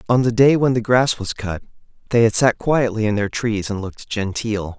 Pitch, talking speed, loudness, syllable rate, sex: 110 Hz, 225 wpm, -19 LUFS, 5.1 syllables/s, male